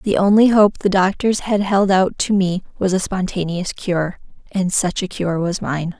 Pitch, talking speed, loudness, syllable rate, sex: 190 Hz, 200 wpm, -18 LUFS, 4.4 syllables/s, female